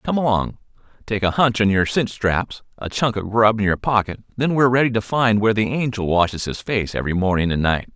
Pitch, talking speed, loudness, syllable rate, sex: 105 Hz, 235 wpm, -19 LUFS, 5.8 syllables/s, male